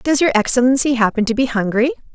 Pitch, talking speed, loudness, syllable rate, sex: 245 Hz, 195 wpm, -16 LUFS, 6.5 syllables/s, female